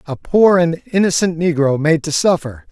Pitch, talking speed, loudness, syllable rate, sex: 165 Hz, 175 wpm, -15 LUFS, 4.7 syllables/s, male